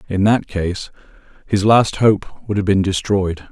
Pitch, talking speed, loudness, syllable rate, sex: 100 Hz, 170 wpm, -17 LUFS, 4.0 syllables/s, male